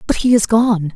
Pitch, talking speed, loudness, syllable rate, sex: 210 Hz, 250 wpm, -14 LUFS, 4.9 syllables/s, female